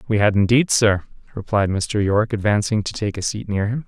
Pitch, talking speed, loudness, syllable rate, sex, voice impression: 105 Hz, 215 wpm, -19 LUFS, 5.6 syllables/s, male, masculine, adult-like, tensed, slightly powerful, bright, clear, slightly raspy, cool, intellectual, calm, friendly, reassuring, slightly wild, lively